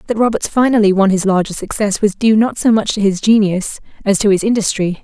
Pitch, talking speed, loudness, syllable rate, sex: 205 Hz, 225 wpm, -14 LUFS, 5.9 syllables/s, female